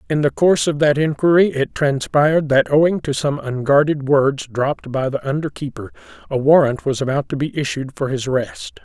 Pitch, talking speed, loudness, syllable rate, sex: 145 Hz, 195 wpm, -18 LUFS, 5.4 syllables/s, male